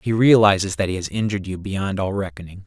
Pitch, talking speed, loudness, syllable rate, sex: 100 Hz, 225 wpm, -20 LUFS, 6.3 syllables/s, male